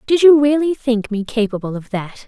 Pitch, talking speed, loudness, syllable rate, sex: 240 Hz, 210 wpm, -16 LUFS, 5.1 syllables/s, female